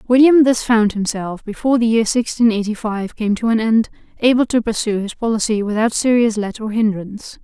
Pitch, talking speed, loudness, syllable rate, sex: 220 Hz, 195 wpm, -17 LUFS, 5.5 syllables/s, female